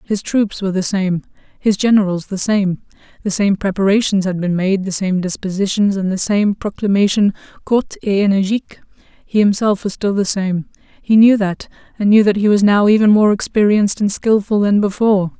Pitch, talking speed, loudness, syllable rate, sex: 200 Hz, 185 wpm, -15 LUFS, 5.5 syllables/s, female